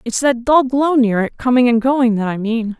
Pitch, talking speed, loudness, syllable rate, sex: 245 Hz, 255 wpm, -15 LUFS, 4.8 syllables/s, female